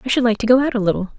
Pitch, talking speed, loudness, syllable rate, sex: 235 Hz, 405 wpm, -17 LUFS, 8.5 syllables/s, female